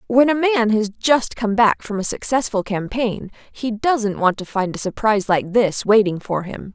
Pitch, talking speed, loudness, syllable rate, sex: 215 Hz, 205 wpm, -19 LUFS, 4.5 syllables/s, female